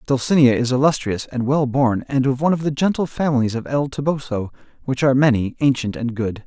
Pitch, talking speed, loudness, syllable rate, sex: 135 Hz, 205 wpm, -19 LUFS, 5.9 syllables/s, male